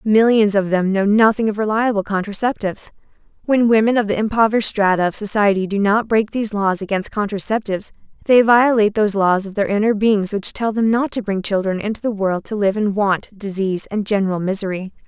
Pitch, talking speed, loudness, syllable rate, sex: 205 Hz, 195 wpm, -17 LUFS, 6.0 syllables/s, female